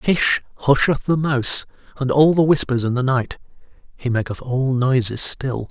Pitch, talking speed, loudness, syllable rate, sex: 130 Hz, 170 wpm, -18 LUFS, 4.6 syllables/s, male